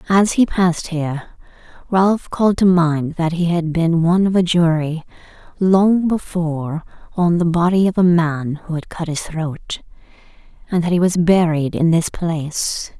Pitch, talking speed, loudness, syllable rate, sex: 170 Hz, 170 wpm, -17 LUFS, 4.5 syllables/s, female